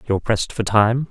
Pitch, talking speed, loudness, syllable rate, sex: 110 Hz, 220 wpm, -19 LUFS, 6.2 syllables/s, male